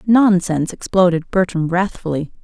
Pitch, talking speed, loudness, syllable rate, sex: 180 Hz, 100 wpm, -17 LUFS, 5.1 syllables/s, female